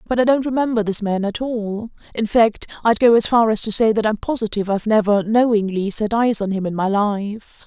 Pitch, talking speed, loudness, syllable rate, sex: 215 Hz, 210 wpm, -18 LUFS, 5.5 syllables/s, female